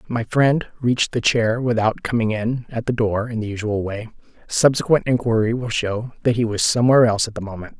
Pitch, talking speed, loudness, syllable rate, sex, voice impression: 115 Hz, 210 wpm, -20 LUFS, 5.8 syllables/s, male, masculine, middle-aged, powerful, hard, slightly halting, raspy, mature, wild, lively, strict, intense, sharp